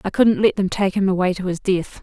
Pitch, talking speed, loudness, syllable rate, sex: 190 Hz, 295 wpm, -19 LUFS, 5.7 syllables/s, female